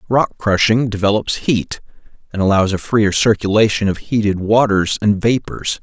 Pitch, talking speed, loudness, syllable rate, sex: 105 Hz, 145 wpm, -16 LUFS, 4.7 syllables/s, male